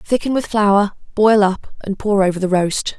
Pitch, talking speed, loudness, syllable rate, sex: 205 Hz, 200 wpm, -16 LUFS, 4.6 syllables/s, female